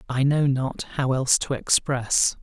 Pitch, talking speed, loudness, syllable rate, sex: 135 Hz, 175 wpm, -22 LUFS, 4.0 syllables/s, male